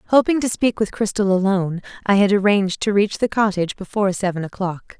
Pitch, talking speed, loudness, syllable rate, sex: 200 Hz, 190 wpm, -19 LUFS, 6.2 syllables/s, female